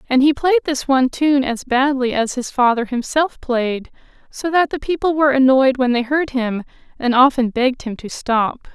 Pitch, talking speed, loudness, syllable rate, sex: 265 Hz, 200 wpm, -17 LUFS, 5.0 syllables/s, female